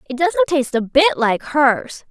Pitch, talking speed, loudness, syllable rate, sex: 285 Hz, 200 wpm, -17 LUFS, 4.3 syllables/s, female